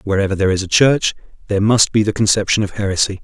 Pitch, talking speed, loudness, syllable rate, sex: 100 Hz, 225 wpm, -16 LUFS, 7.2 syllables/s, male